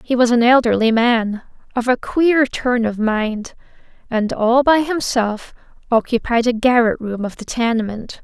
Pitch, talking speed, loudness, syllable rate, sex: 235 Hz, 160 wpm, -17 LUFS, 4.3 syllables/s, female